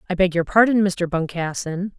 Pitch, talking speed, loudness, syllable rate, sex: 180 Hz, 180 wpm, -20 LUFS, 5.1 syllables/s, female